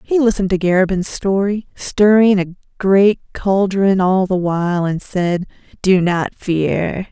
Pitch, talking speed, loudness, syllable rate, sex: 190 Hz, 145 wpm, -16 LUFS, 4.1 syllables/s, female